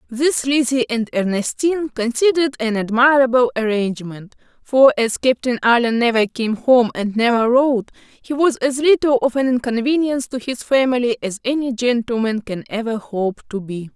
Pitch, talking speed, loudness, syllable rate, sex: 245 Hz, 155 wpm, -18 LUFS, 5.1 syllables/s, female